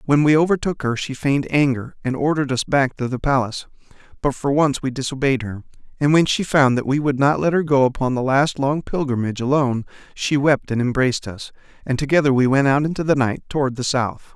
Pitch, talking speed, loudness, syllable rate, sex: 135 Hz, 220 wpm, -19 LUFS, 6.0 syllables/s, male